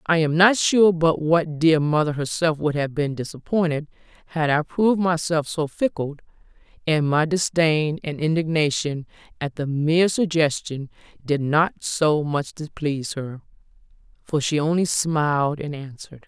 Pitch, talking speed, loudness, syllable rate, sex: 155 Hz, 145 wpm, -21 LUFS, 4.6 syllables/s, female